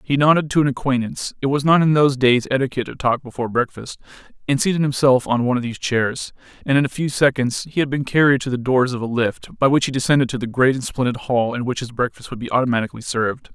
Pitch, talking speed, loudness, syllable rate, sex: 130 Hz, 245 wpm, -19 LUFS, 6.7 syllables/s, male